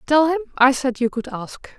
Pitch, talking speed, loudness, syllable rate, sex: 270 Hz, 235 wpm, -19 LUFS, 5.0 syllables/s, female